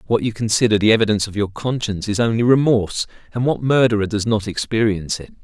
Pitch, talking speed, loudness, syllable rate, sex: 110 Hz, 200 wpm, -18 LUFS, 6.7 syllables/s, male